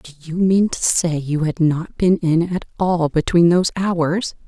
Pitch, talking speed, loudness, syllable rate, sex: 170 Hz, 200 wpm, -18 LUFS, 4.2 syllables/s, female